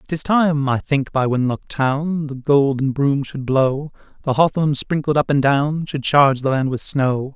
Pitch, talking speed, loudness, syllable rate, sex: 140 Hz, 195 wpm, -18 LUFS, 4.2 syllables/s, male